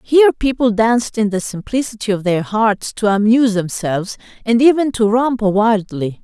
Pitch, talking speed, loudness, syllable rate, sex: 220 Hz, 165 wpm, -16 LUFS, 4.9 syllables/s, female